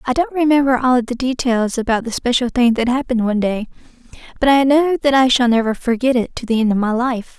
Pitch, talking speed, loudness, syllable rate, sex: 250 Hz, 235 wpm, -16 LUFS, 6.0 syllables/s, female